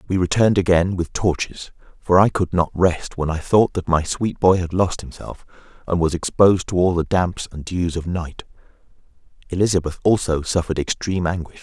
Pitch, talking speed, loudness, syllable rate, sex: 90 Hz, 185 wpm, -20 LUFS, 5.4 syllables/s, male